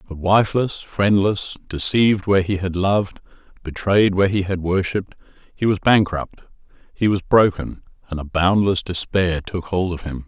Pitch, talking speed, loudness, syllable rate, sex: 95 Hz, 160 wpm, -19 LUFS, 5.1 syllables/s, male